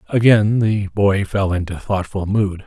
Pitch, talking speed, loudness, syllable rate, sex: 100 Hz, 180 wpm, -18 LUFS, 4.4 syllables/s, male